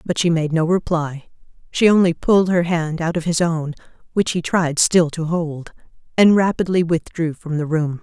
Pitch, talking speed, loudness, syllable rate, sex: 165 Hz, 195 wpm, -18 LUFS, 4.8 syllables/s, female